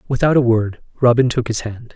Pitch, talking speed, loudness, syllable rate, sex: 120 Hz, 215 wpm, -17 LUFS, 5.7 syllables/s, male